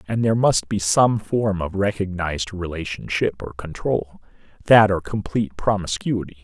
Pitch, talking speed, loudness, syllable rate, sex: 95 Hz, 130 wpm, -21 LUFS, 5.0 syllables/s, male